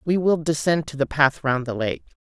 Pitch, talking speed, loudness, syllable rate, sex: 145 Hz, 240 wpm, -22 LUFS, 5.1 syllables/s, female